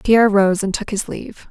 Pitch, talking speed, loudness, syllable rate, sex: 205 Hz, 240 wpm, -17 LUFS, 5.7 syllables/s, female